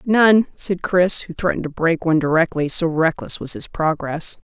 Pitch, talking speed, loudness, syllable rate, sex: 170 Hz, 185 wpm, -18 LUFS, 4.9 syllables/s, female